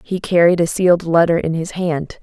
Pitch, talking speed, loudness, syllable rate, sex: 170 Hz, 215 wpm, -16 LUFS, 5.2 syllables/s, female